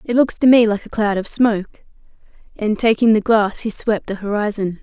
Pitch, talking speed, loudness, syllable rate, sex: 215 Hz, 210 wpm, -17 LUFS, 5.2 syllables/s, female